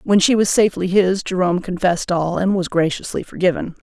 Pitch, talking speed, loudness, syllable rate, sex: 185 Hz, 185 wpm, -18 LUFS, 6.0 syllables/s, female